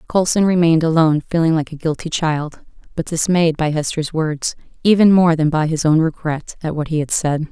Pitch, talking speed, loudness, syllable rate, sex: 160 Hz, 200 wpm, -17 LUFS, 5.4 syllables/s, female